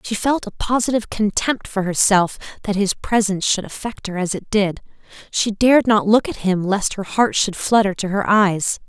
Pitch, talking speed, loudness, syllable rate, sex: 205 Hz, 205 wpm, -19 LUFS, 5.0 syllables/s, female